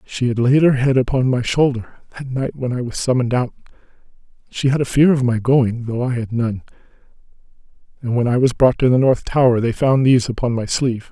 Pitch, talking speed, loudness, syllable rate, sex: 125 Hz, 210 wpm, -17 LUFS, 5.8 syllables/s, male